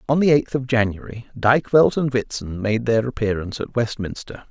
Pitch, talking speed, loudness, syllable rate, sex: 120 Hz, 175 wpm, -20 LUFS, 5.3 syllables/s, male